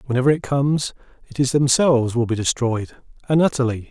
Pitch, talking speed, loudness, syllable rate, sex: 130 Hz, 170 wpm, -19 LUFS, 6.1 syllables/s, male